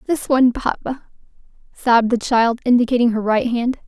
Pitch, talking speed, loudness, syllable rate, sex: 240 Hz, 155 wpm, -17 LUFS, 5.5 syllables/s, female